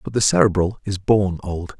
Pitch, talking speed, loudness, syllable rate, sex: 95 Hz, 200 wpm, -19 LUFS, 4.9 syllables/s, male